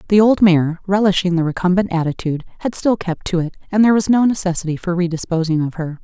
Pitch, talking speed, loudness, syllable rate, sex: 180 Hz, 220 wpm, -17 LUFS, 6.4 syllables/s, female